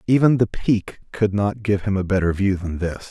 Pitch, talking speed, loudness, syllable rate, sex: 100 Hz, 230 wpm, -21 LUFS, 4.9 syllables/s, male